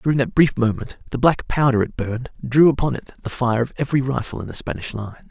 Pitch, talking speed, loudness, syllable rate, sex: 130 Hz, 235 wpm, -21 LUFS, 6.0 syllables/s, male